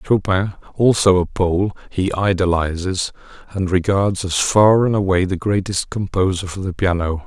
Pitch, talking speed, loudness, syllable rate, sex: 95 Hz, 150 wpm, -18 LUFS, 4.6 syllables/s, male